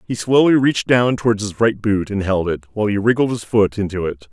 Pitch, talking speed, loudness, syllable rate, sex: 105 Hz, 250 wpm, -17 LUFS, 5.9 syllables/s, male